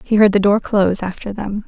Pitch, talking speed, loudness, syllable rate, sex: 205 Hz, 250 wpm, -17 LUFS, 5.7 syllables/s, female